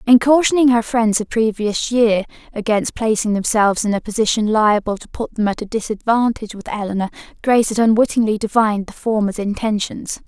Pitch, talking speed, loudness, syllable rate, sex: 220 Hz, 170 wpm, -17 LUFS, 5.7 syllables/s, female